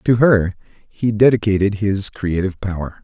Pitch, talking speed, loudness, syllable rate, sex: 105 Hz, 140 wpm, -17 LUFS, 4.8 syllables/s, male